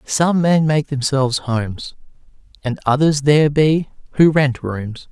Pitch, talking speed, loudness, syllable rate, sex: 140 Hz, 140 wpm, -17 LUFS, 4.3 syllables/s, male